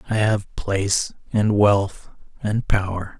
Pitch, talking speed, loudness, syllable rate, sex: 100 Hz, 130 wpm, -21 LUFS, 3.6 syllables/s, male